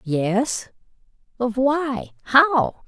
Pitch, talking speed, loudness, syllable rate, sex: 240 Hz, 65 wpm, -21 LUFS, 2.5 syllables/s, female